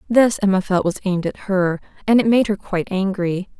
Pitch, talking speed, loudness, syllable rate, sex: 195 Hz, 215 wpm, -19 LUFS, 5.8 syllables/s, female